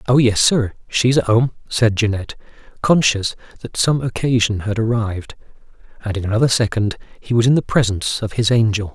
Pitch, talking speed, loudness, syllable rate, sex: 115 Hz, 180 wpm, -18 LUFS, 5.8 syllables/s, male